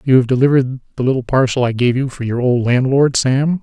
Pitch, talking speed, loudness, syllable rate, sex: 130 Hz, 230 wpm, -15 LUFS, 5.7 syllables/s, male